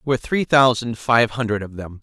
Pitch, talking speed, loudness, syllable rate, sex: 115 Hz, 235 wpm, -19 LUFS, 6.3 syllables/s, male